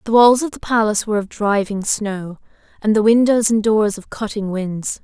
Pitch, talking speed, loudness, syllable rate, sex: 215 Hz, 205 wpm, -17 LUFS, 5.1 syllables/s, female